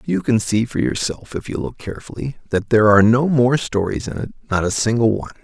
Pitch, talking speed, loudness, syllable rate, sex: 110 Hz, 230 wpm, -18 LUFS, 6.1 syllables/s, male